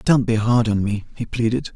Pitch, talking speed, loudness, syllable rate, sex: 115 Hz, 240 wpm, -20 LUFS, 5.2 syllables/s, male